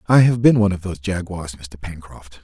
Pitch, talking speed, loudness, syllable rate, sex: 95 Hz, 220 wpm, -18 LUFS, 5.8 syllables/s, male